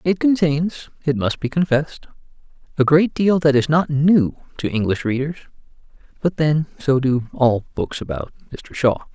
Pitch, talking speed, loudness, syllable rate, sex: 145 Hz, 165 wpm, -19 LUFS, 4.7 syllables/s, male